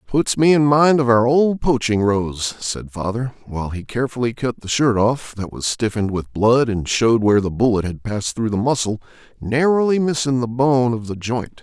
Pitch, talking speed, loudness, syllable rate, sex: 120 Hz, 205 wpm, -19 LUFS, 5.2 syllables/s, male